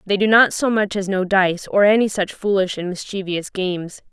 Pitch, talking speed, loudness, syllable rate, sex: 195 Hz, 220 wpm, -18 LUFS, 5.2 syllables/s, female